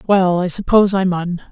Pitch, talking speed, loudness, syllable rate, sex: 185 Hz, 200 wpm, -16 LUFS, 5.4 syllables/s, female